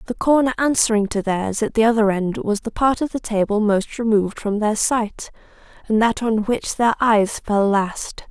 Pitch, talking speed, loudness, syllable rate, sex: 220 Hz, 200 wpm, -19 LUFS, 4.8 syllables/s, female